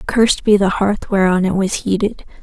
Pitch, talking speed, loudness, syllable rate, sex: 200 Hz, 200 wpm, -16 LUFS, 5.2 syllables/s, female